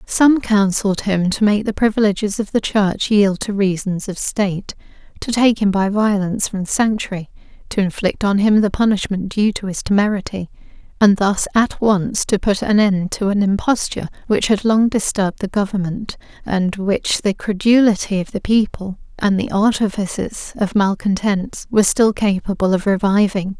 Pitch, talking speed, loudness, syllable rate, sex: 200 Hz, 170 wpm, -17 LUFS, 4.9 syllables/s, female